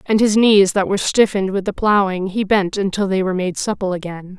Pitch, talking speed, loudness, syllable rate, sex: 195 Hz, 235 wpm, -17 LUFS, 5.9 syllables/s, female